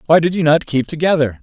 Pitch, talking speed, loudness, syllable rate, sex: 155 Hz, 250 wpm, -15 LUFS, 6.3 syllables/s, male